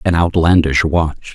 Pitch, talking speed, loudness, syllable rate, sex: 80 Hz, 135 wpm, -14 LUFS, 4.0 syllables/s, male